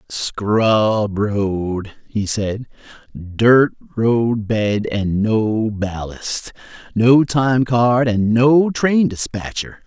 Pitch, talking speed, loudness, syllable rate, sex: 110 Hz, 105 wpm, -17 LUFS, 2.3 syllables/s, male